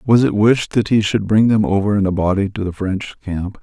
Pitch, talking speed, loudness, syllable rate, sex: 105 Hz, 265 wpm, -17 LUFS, 5.2 syllables/s, male